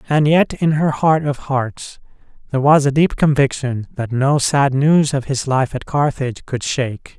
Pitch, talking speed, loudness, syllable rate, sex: 140 Hz, 190 wpm, -17 LUFS, 4.5 syllables/s, male